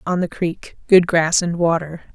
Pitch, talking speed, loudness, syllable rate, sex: 170 Hz, 170 wpm, -18 LUFS, 4.5 syllables/s, female